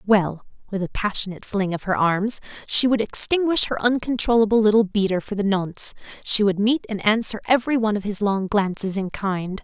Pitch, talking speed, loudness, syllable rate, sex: 210 Hz, 195 wpm, -21 LUFS, 4.7 syllables/s, female